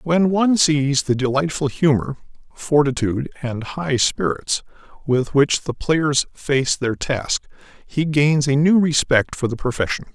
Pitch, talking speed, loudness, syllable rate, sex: 140 Hz, 150 wpm, -19 LUFS, 4.2 syllables/s, male